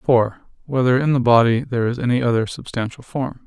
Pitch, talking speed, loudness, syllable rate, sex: 120 Hz, 190 wpm, -19 LUFS, 6.7 syllables/s, male